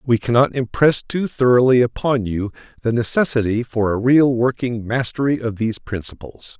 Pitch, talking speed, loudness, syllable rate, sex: 120 Hz, 155 wpm, -18 LUFS, 5.0 syllables/s, male